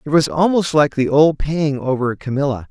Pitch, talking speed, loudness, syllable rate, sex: 145 Hz, 200 wpm, -17 LUFS, 5.0 syllables/s, male